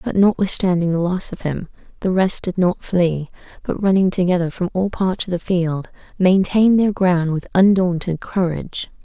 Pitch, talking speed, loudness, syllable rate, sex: 180 Hz, 175 wpm, -18 LUFS, 4.8 syllables/s, female